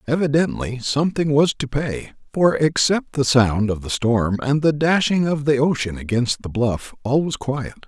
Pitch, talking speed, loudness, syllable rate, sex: 135 Hz, 185 wpm, -20 LUFS, 4.6 syllables/s, male